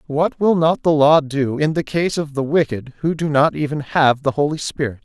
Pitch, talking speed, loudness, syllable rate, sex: 150 Hz, 240 wpm, -18 LUFS, 5.0 syllables/s, male